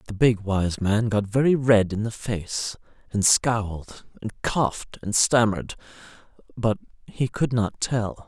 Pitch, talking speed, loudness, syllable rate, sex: 110 Hz, 150 wpm, -23 LUFS, 4.0 syllables/s, male